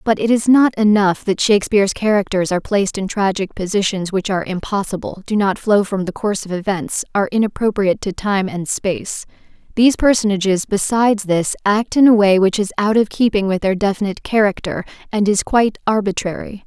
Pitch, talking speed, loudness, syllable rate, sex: 200 Hz, 180 wpm, -17 LUFS, 5.8 syllables/s, female